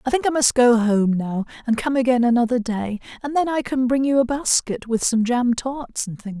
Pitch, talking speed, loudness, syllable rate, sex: 245 Hz, 245 wpm, -20 LUFS, 5.2 syllables/s, female